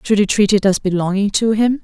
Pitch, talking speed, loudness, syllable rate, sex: 205 Hz, 260 wpm, -15 LUFS, 5.8 syllables/s, female